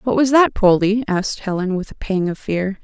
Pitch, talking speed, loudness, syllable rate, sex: 205 Hz, 235 wpm, -18 LUFS, 5.2 syllables/s, female